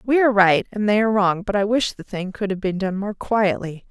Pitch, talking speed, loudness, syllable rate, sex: 200 Hz, 275 wpm, -20 LUFS, 5.7 syllables/s, female